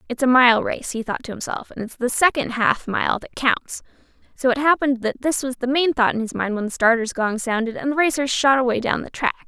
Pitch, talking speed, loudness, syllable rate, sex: 250 Hz, 260 wpm, -20 LUFS, 5.7 syllables/s, female